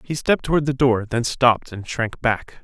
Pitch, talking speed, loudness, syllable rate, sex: 125 Hz, 230 wpm, -20 LUFS, 5.2 syllables/s, male